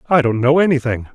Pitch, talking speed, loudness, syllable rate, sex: 135 Hz, 210 wpm, -16 LUFS, 6.5 syllables/s, male